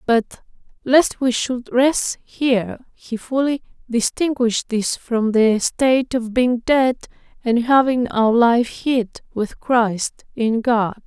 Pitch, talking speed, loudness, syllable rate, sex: 240 Hz, 135 wpm, -19 LUFS, 3.4 syllables/s, female